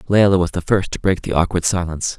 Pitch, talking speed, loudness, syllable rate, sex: 90 Hz, 250 wpm, -18 LUFS, 6.4 syllables/s, male